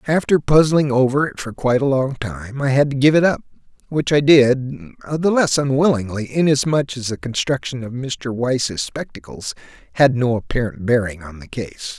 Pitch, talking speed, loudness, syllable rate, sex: 130 Hz, 180 wpm, -18 LUFS, 4.8 syllables/s, male